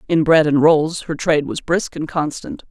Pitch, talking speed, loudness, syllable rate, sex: 155 Hz, 220 wpm, -17 LUFS, 4.9 syllables/s, female